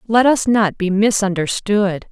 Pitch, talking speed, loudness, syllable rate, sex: 205 Hz, 140 wpm, -16 LUFS, 4.1 syllables/s, female